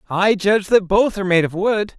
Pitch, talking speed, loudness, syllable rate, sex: 200 Hz, 240 wpm, -17 LUFS, 5.6 syllables/s, male